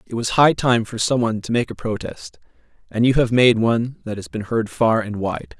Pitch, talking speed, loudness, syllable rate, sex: 115 Hz, 245 wpm, -19 LUFS, 5.4 syllables/s, male